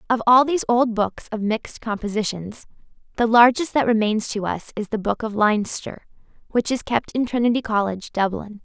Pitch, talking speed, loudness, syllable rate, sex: 225 Hz, 180 wpm, -21 LUFS, 5.3 syllables/s, female